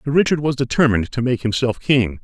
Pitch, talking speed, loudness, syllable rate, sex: 125 Hz, 215 wpm, -18 LUFS, 6.1 syllables/s, male